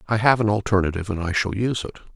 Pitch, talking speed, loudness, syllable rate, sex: 105 Hz, 250 wpm, -22 LUFS, 7.9 syllables/s, male